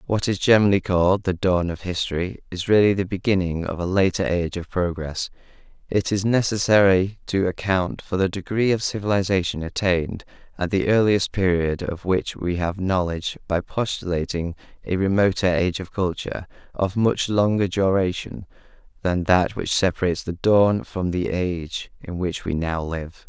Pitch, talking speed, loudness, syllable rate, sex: 95 Hz, 160 wpm, -22 LUFS, 5.1 syllables/s, male